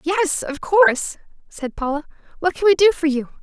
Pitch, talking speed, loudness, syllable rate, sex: 330 Hz, 195 wpm, -19 LUFS, 5.2 syllables/s, female